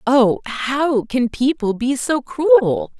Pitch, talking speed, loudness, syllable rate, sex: 245 Hz, 140 wpm, -18 LUFS, 3.2 syllables/s, female